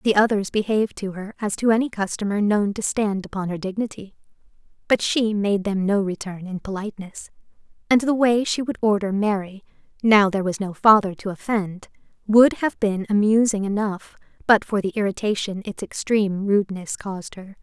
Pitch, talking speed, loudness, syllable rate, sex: 205 Hz, 175 wpm, -21 LUFS, 5.4 syllables/s, female